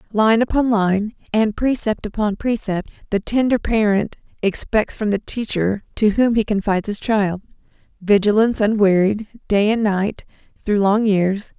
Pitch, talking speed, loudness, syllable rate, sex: 210 Hz, 145 wpm, -19 LUFS, 4.6 syllables/s, female